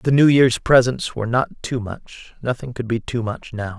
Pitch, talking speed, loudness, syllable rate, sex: 120 Hz, 220 wpm, -19 LUFS, 4.8 syllables/s, male